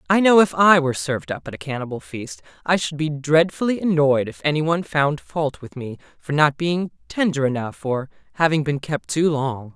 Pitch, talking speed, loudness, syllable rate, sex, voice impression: 145 Hz, 205 wpm, -20 LUFS, 5.2 syllables/s, male, masculine, slightly adult-like, fluent, slightly cool, refreshing, slightly sincere, slightly sweet